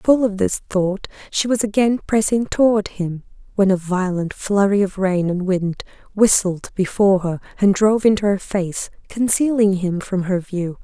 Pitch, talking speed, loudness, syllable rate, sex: 195 Hz, 170 wpm, -19 LUFS, 4.6 syllables/s, female